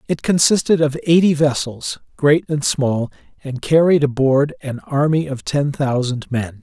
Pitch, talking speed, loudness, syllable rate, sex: 140 Hz, 165 wpm, -17 LUFS, 4.2 syllables/s, male